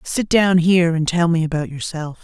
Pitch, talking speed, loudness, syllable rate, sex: 170 Hz, 215 wpm, -17 LUFS, 5.2 syllables/s, female